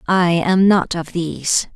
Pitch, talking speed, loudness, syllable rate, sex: 175 Hz, 170 wpm, -17 LUFS, 3.9 syllables/s, female